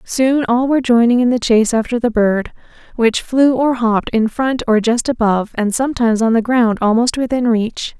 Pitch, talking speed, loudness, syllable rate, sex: 235 Hz, 205 wpm, -15 LUFS, 5.3 syllables/s, female